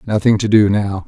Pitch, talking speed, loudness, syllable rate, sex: 105 Hz, 225 wpm, -14 LUFS, 5.4 syllables/s, male